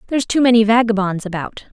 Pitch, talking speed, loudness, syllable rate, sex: 220 Hz, 170 wpm, -16 LUFS, 6.5 syllables/s, female